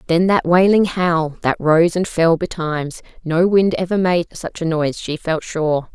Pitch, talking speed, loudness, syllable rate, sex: 170 Hz, 190 wpm, -17 LUFS, 4.4 syllables/s, female